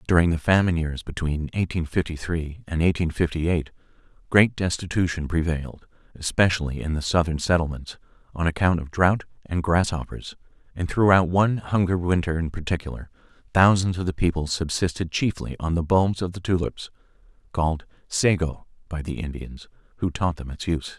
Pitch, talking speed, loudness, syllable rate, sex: 85 Hz, 155 wpm, -24 LUFS, 5.5 syllables/s, male